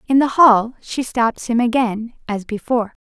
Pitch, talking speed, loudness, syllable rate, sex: 235 Hz, 180 wpm, -17 LUFS, 4.9 syllables/s, female